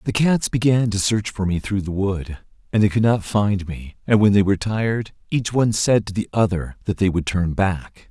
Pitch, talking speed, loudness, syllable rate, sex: 105 Hz, 235 wpm, -20 LUFS, 5.1 syllables/s, male